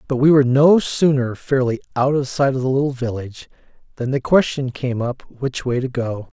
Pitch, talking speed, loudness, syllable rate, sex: 130 Hz, 205 wpm, -19 LUFS, 5.3 syllables/s, male